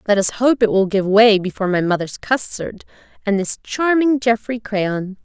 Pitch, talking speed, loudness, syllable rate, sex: 215 Hz, 185 wpm, -17 LUFS, 4.8 syllables/s, female